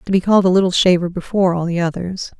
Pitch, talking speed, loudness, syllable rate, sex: 180 Hz, 250 wpm, -16 LUFS, 7.2 syllables/s, female